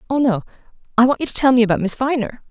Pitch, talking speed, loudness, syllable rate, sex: 245 Hz, 265 wpm, -17 LUFS, 7.6 syllables/s, female